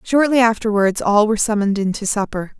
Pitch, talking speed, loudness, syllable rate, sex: 215 Hz, 185 wpm, -17 LUFS, 6.1 syllables/s, female